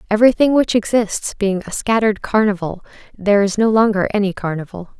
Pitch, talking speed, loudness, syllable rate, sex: 205 Hz, 155 wpm, -17 LUFS, 5.9 syllables/s, female